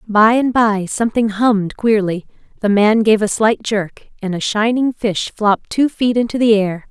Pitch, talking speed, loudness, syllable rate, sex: 215 Hz, 190 wpm, -16 LUFS, 4.6 syllables/s, female